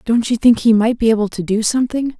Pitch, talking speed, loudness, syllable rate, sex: 230 Hz, 275 wpm, -15 LUFS, 6.2 syllables/s, female